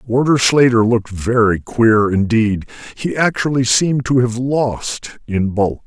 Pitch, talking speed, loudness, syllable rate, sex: 120 Hz, 135 wpm, -16 LUFS, 4.1 syllables/s, male